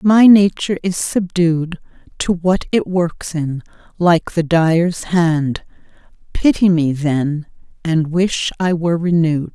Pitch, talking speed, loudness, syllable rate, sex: 170 Hz, 130 wpm, -16 LUFS, 3.7 syllables/s, female